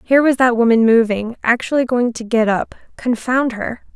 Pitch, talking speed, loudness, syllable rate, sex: 235 Hz, 150 wpm, -16 LUFS, 5.1 syllables/s, female